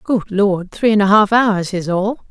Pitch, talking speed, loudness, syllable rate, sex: 205 Hz, 210 wpm, -15 LUFS, 3.9 syllables/s, female